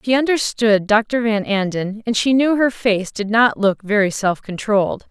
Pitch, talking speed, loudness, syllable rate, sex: 220 Hz, 190 wpm, -17 LUFS, 4.5 syllables/s, female